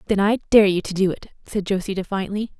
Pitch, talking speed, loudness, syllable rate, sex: 195 Hz, 230 wpm, -21 LUFS, 6.3 syllables/s, female